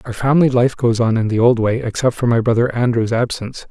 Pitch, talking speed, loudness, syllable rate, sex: 120 Hz, 245 wpm, -16 LUFS, 6.1 syllables/s, male